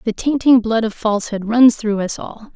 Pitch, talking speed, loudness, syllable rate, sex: 225 Hz, 210 wpm, -16 LUFS, 5.0 syllables/s, female